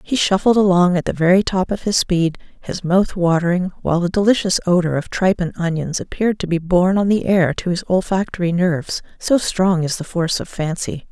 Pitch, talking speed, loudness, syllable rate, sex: 180 Hz, 210 wpm, -18 LUFS, 5.7 syllables/s, female